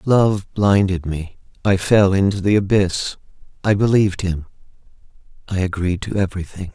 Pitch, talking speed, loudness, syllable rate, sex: 95 Hz, 135 wpm, -19 LUFS, 4.9 syllables/s, male